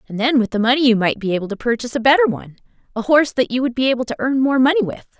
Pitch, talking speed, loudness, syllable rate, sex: 250 Hz, 290 wpm, -17 LUFS, 8.0 syllables/s, female